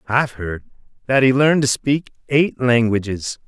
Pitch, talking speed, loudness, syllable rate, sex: 125 Hz, 155 wpm, -18 LUFS, 4.9 syllables/s, male